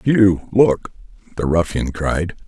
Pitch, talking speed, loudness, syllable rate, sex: 95 Hz, 120 wpm, -18 LUFS, 3.5 syllables/s, male